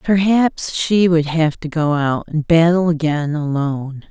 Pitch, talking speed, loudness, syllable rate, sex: 160 Hz, 160 wpm, -17 LUFS, 4.1 syllables/s, female